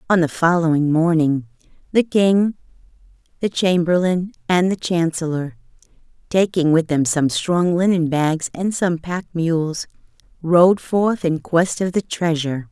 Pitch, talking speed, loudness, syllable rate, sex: 170 Hz, 135 wpm, -18 LUFS, 4.1 syllables/s, female